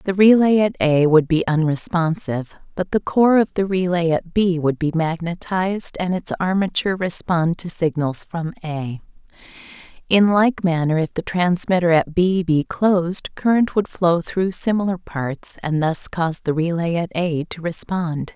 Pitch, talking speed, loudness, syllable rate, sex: 175 Hz, 165 wpm, -19 LUFS, 4.5 syllables/s, female